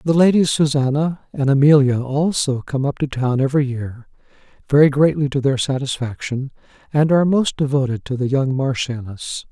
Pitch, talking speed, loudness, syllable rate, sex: 140 Hz, 160 wpm, -18 LUFS, 5.1 syllables/s, male